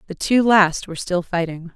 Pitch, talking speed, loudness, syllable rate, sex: 185 Hz, 205 wpm, -19 LUFS, 5.1 syllables/s, female